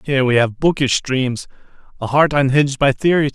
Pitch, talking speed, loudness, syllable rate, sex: 135 Hz, 180 wpm, -16 LUFS, 5.5 syllables/s, male